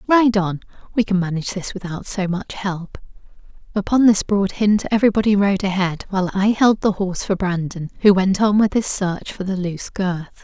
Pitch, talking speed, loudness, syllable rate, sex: 195 Hz, 195 wpm, -19 LUFS, 5.3 syllables/s, female